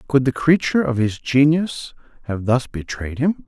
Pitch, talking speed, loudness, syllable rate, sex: 130 Hz, 175 wpm, -19 LUFS, 4.7 syllables/s, male